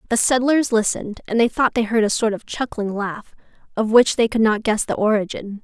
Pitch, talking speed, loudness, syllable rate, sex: 220 Hz, 225 wpm, -19 LUFS, 5.5 syllables/s, female